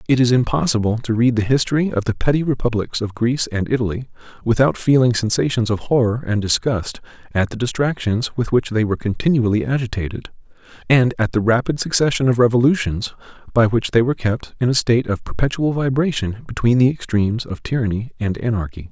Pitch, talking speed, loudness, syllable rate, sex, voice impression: 120 Hz, 180 wpm, -19 LUFS, 6.0 syllables/s, male, masculine, adult-like, slightly relaxed, slightly soft, clear, fluent, raspy, intellectual, calm, mature, reassuring, slightly lively, modest